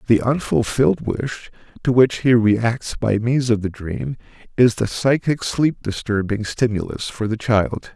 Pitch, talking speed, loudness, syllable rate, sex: 115 Hz, 160 wpm, -19 LUFS, 4.2 syllables/s, male